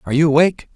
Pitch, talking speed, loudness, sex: 150 Hz, 235 wpm, -15 LUFS, male